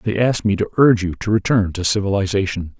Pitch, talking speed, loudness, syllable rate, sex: 100 Hz, 215 wpm, -18 LUFS, 6.6 syllables/s, male